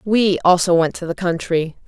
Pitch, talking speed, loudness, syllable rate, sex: 175 Hz, 190 wpm, -17 LUFS, 4.9 syllables/s, female